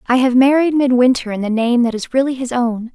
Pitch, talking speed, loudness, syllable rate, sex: 250 Hz, 245 wpm, -15 LUFS, 5.8 syllables/s, female